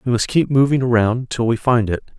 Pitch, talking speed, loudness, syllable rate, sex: 120 Hz, 250 wpm, -17 LUFS, 6.3 syllables/s, male